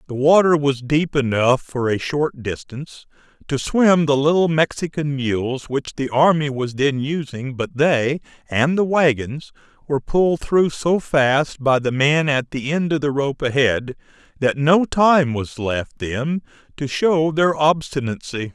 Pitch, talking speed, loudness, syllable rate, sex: 145 Hz, 165 wpm, -19 LUFS, 4.2 syllables/s, male